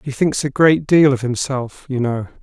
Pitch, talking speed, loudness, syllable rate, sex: 135 Hz, 225 wpm, -17 LUFS, 4.6 syllables/s, male